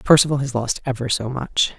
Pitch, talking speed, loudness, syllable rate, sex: 130 Hz, 200 wpm, -20 LUFS, 5.5 syllables/s, female